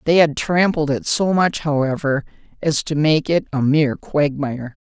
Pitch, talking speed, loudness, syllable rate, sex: 150 Hz, 175 wpm, -18 LUFS, 4.8 syllables/s, female